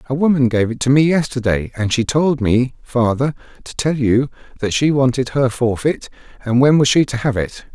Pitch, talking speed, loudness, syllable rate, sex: 130 Hz, 210 wpm, -17 LUFS, 5.1 syllables/s, male